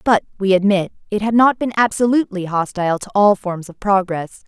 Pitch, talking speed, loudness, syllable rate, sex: 200 Hz, 190 wpm, -17 LUFS, 5.6 syllables/s, female